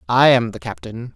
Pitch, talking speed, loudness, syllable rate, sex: 120 Hz, 210 wpm, -16 LUFS, 5.2 syllables/s, female